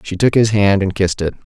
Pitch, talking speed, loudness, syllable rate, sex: 100 Hz, 270 wpm, -15 LUFS, 6.4 syllables/s, male